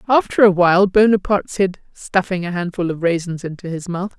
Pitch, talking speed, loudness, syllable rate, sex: 185 Hz, 185 wpm, -17 LUFS, 5.6 syllables/s, female